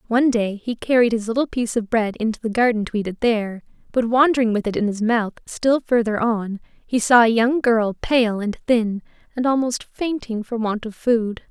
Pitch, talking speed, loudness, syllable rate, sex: 230 Hz, 215 wpm, -20 LUFS, 5.1 syllables/s, female